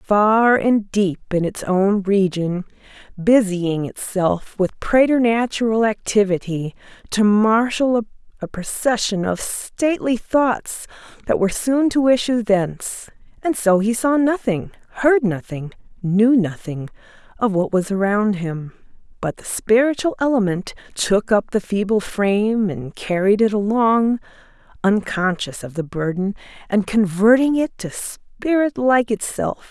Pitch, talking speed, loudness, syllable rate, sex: 210 Hz, 125 wpm, -19 LUFS, 4.0 syllables/s, female